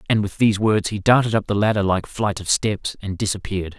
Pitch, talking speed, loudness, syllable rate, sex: 100 Hz, 240 wpm, -20 LUFS, 5.9 syllables/s, male